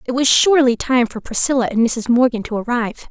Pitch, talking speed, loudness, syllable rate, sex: 245 Hz, 210 wpm, -16 LUFS, 6.0 syllables/s, female